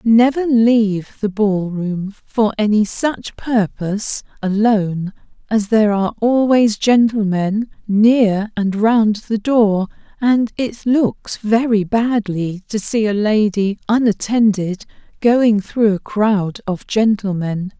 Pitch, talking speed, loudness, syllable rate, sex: 215 Hz, 120 wpm, -16 LUFS, 3.5 syllables/s, female